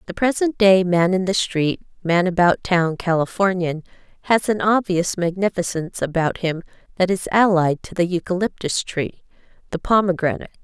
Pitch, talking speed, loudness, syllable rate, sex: 180 Hz, 145 wpm, -20 LUFS, 5.1 syllables/s, female